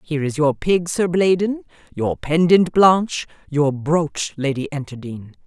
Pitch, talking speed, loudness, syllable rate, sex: 155 Hz, 145 wpm, -19 LUFS, 4.3 syllables/s, female